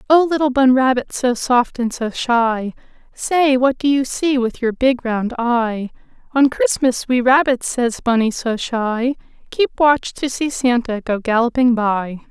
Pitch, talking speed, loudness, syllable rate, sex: 250 Hz, 170 wpm, -17 LUFS, 4.0 syllables/s, female